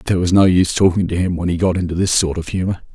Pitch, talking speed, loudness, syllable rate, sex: 90 Hz, 305 wpm, -16 LUFS, 7.1 syllables/s, male